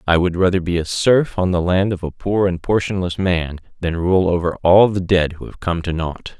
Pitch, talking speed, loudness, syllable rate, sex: 90 Hz, 245 wpm, -18 LUFS, 5.0 syllables/s, male